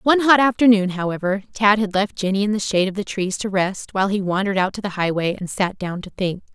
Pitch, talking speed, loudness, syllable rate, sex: 200 Hz, 255 wpm, -20 LUFS, 6.3 syllables/s, female